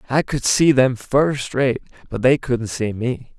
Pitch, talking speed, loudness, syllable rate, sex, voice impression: 130 Hz, 195 wpm, -19 LUFS, 3.8 syllables/s, male, masculine, adult-like, tensed, powerful, bright, clear, cool, intellectual, slightly sincere, friendly, slightly wild, lively, slightly kind